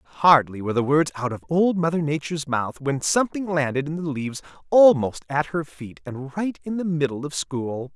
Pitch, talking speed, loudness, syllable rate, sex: 150 Hz, 205 wpm, -22 LUFS, 5.2 syllables/s, male